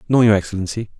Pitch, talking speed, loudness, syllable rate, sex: 105 Hz, 180 wpm, -18 LUFS, 8.0 syllables/s, male